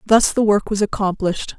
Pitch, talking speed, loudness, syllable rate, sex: 205 Hz, 190 wpm, -18 LUFS, 5.7 syllables/s, female